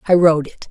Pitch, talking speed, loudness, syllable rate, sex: 165 Hz, 255 wpm, -15 LUFS, 7.3 syllables/s, female